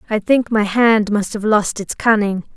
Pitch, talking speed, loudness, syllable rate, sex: 210 Hz, 210 wpm, -16 LUFS, 4.4 syllables/s, female